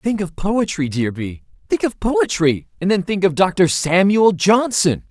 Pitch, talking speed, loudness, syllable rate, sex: 180 Hz, 175 wpm, -17 LUFS, 4.1 syllables/s, male